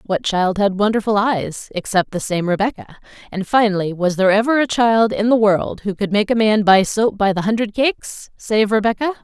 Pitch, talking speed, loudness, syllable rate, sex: 210 Hz, 210 wpm, -17 LUFS, 5.2 syllables/s, female